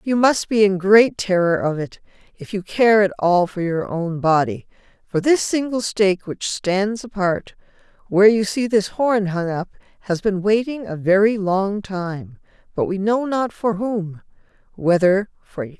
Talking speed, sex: 190 wpm, female